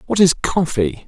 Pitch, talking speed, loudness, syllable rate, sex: 160 Hz, 170 wpm, -17 LUFS, 4.4 syllables/s, male